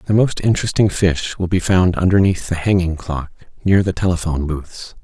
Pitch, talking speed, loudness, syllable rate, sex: 90 Hz, 180 wpm, -17 LUFS, 5.3 syllables/s, male